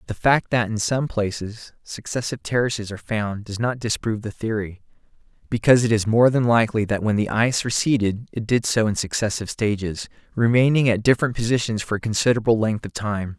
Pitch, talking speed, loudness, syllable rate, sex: 110 Hz, 190 wpm, -21 LUFS, 6.0 syllables/s, male